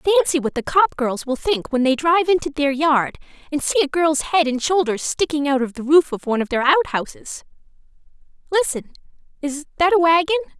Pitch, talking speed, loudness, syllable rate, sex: 305 Hz, 200 wpm, -19 LUFS, 5.9 syllables/s, female